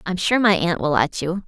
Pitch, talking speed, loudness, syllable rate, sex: 175 Hz, 285 wpm, -19 LUFS, 5.2 syllables/s, female